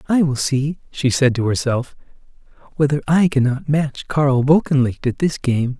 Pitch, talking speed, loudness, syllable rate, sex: 140 Hz, 165 wpm, -18 LUFS, 4.6 syllables/s, male